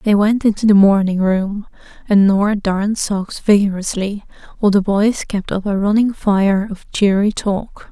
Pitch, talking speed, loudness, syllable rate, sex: 200 Hz, 165 wpm, -16 LUFS, 4.6 syllables/s, female